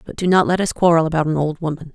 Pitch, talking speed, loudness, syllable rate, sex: 165 Hz, 310 wpm, -18 LUFS, 7.0 syllables/s, female